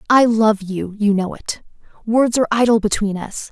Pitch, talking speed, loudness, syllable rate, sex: 215 Hz, 155 wpm, -17 LUFS, 5.0 syllables/s, female